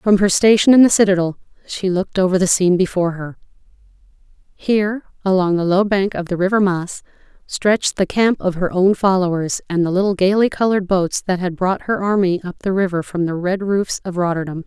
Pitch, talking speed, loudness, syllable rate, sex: 185 Hz, 200 wpm, -17 LUFS, 5.7 syllables/s, female